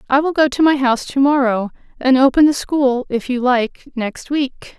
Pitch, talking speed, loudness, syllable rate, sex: 265 Hz, 215 wpm, -16 LUFS, 4.7 syllables/s, female